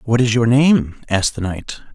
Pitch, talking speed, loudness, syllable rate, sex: 115 Hz, 215 wpm, -16 LUFS, 4.7 syllables/s, male